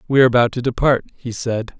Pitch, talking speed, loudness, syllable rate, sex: 120 Hz, 200 wpm, -18 LUFS, 6.0 syllables/s, male